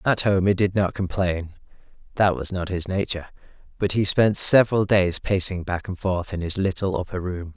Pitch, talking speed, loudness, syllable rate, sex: 95 Hz, 185 wpm, -22 LUFS, 5.1 syllables/s, male